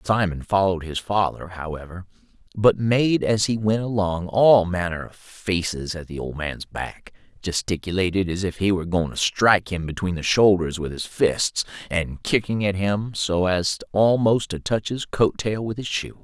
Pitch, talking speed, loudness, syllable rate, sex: 95 Hz, 185 wpm, -22 LUFS, 4.6 syllables/s, male